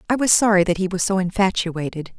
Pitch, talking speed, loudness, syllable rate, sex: 190 Hz, 220 wpm, -19 LUFS, 6.0 syllables/s, female